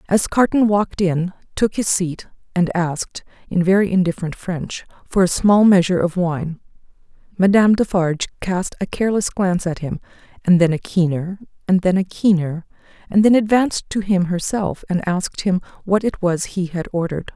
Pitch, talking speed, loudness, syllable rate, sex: 185 Hz, 175 wpm, -19 LUFS, 5.0 syllables/s, female